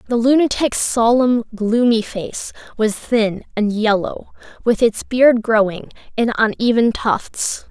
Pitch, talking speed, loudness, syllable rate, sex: 225 Hz, 125 wpm, -17 LUFS, 3.7 syllables/s, female